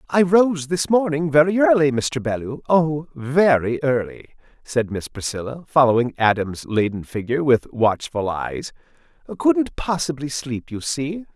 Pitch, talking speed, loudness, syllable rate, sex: 145 Hz, 125 wpm, -20 LUFS, 4.4 syllables/s, male